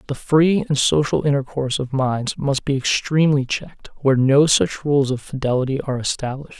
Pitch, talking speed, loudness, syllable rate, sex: 140 Hz, 175 wpm, -19 LUFS, 5.6 syllables/s, male